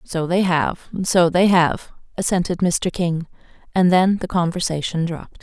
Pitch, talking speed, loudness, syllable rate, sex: 175 Hz, 155 wpm, -19 LUFS, 4.5 syllables/s, female